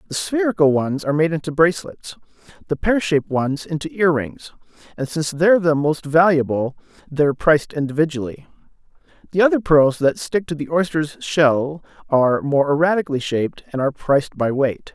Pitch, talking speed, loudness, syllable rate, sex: 155 Hz, 160 wpm, -19 LUFS, 5.6 syllables/s, male